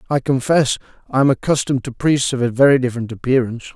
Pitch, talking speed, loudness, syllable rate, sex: 130 Hz, 190 wpm, -17 LUFS, 7.0 syllables/s, male